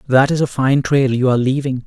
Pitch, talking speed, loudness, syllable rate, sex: 135 Hz, 260 wpm, -16 LUFS, 6.0 syllables/s, male